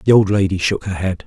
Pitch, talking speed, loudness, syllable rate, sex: 100 Hz, 285 wpm, -17 LUFS, 6.2 syllables/s, male